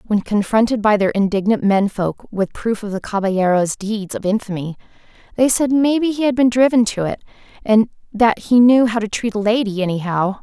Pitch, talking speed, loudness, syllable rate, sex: 215 Hz, 195 wpm, -17 LUFS, 5.4 syllables/s, female